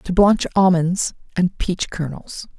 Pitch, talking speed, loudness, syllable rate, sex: 180 Hz, 140 wpm, -19 LUFS, 3.7 syllables/s, female